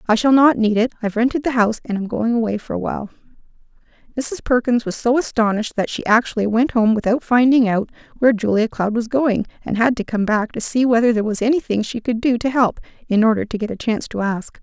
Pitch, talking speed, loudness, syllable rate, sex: 230 Hz, 240 wpm, -18 LUFS, 6.4 syllables/s, female